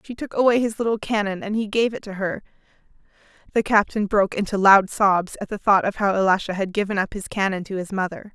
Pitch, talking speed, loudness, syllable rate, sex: 205 Hz, 230 wpm, -21 LUFS, 6.1 syllables/s, female